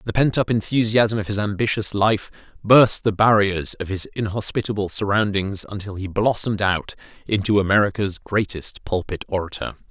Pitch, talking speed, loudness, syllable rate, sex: 100 Hz, 145 wpm, -20 LUFS, 5.2 syllables/s, male